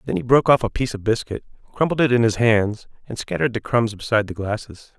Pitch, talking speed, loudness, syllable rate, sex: 115 Hz, 240 wpm, -20 LUFS, 6.7 syllables/s, male